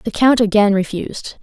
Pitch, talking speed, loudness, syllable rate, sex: 210 Hz, 170 wpm, -15 LUFS, 5.1 syllables/s, female